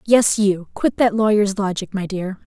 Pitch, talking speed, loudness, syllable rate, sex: 205 Hz, 190 wpm, -19 LUFS, 4.4 syllables/s, female